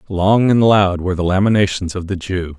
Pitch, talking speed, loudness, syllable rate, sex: 95 Hz, 210 wpm, -16 LUFS, 5.4 syllables/s, male